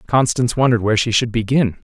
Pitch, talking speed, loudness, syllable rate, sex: 115 Hz, 190 wpm, -17 LUFS, 7.1 syllables/s, male